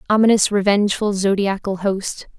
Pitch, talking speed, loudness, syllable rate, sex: 200 Hz, 100 wpm, -18 LUFS, 5.2 syllables/s, female